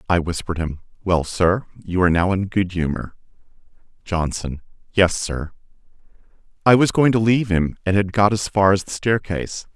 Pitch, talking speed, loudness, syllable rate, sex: 95 Hz, 170 wpm, -20 LUFS, 5.3 syllables/s, male